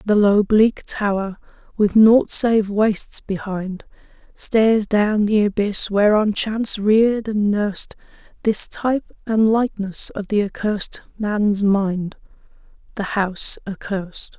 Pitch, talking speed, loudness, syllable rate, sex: 210 Hz, 125 wpm, -19 LUFS, 3.8 syllables/s, female